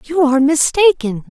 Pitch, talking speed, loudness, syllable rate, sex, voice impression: 295 Hz, 135 wpm, -14 LUFS, 5.1 syllables/s, female, feminine, adult-like, tensed, slightly powerful, clear, fluent, intellectual, calm, unique, lively, slightly sharp